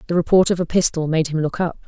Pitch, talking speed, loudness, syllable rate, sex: 165 Hz, 290 wpm, -19 LUFS, 6.8 syllables/s, female